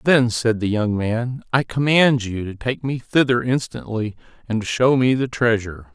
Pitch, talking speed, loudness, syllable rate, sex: 120 Hz, 190 wpm, -20 LUFS, 4.6 syllables/s, male